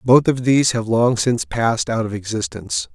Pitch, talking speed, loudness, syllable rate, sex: 120 Hz, 205 wpm, -18 LUFS, 5.7 syllables/s, male